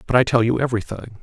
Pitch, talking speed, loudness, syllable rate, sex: 115 Hz, 245 wpm, -19 LUFS, 7.3 syllables/s, male